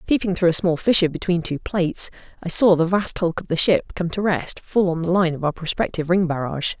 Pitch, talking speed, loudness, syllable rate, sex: 175 Hz, 245 wpm, -20 LUFS, 6.0 syllables/s, female